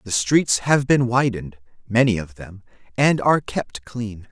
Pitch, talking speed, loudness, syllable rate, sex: 115 Hz, 165 wpm, -20 LUFS, 4.4 syllables/s, male